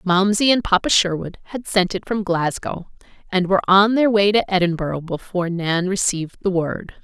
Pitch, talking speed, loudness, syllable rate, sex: 185 Hz, 180 wpm, -19 LUFS, 5.1 syllables/s, female